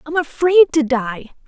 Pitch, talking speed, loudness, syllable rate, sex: 295 Hz, 160 wpm, -15 LUFS, 5.1 syllables/s, female